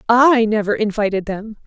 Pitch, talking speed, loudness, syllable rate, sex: 225 Hz, 145 wpm, -17 LUFS, 4.9 syllables/s, female